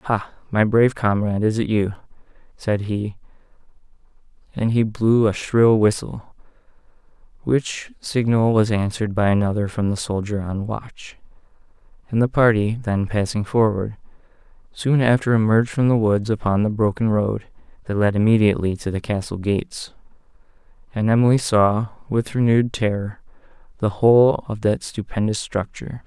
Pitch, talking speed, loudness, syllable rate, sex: 110 Hz, 140 wpm, -20 LUFS, 5.0 syllables/s, male